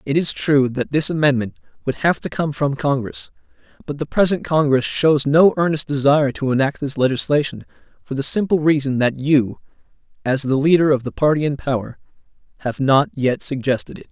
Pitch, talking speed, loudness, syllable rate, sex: 140 Hz, 185 wpm, -18 LUFS, 5.4 syllables/s, male